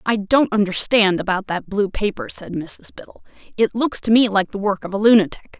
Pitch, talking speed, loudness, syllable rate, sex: 205 Hz, 215 wpm, -19 LUFS, 5.3 syllables/s, female